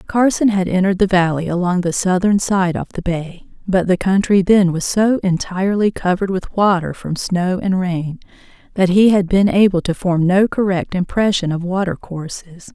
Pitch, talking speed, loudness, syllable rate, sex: 185 Hz, 180 wpm, -16 LUFS, 4.9 syllables/s, female